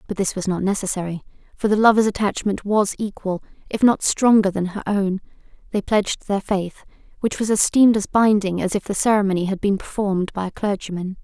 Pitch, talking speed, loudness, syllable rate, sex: 200 Hz, 190 wpm, -20 LUFS, 5.9 syllables/s, female